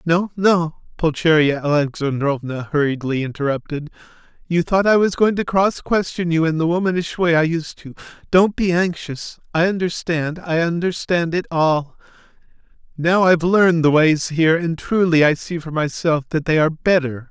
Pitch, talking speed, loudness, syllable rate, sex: 165 Hz, 165 wpm, -18 LUFS, 4.9 syllables/s, male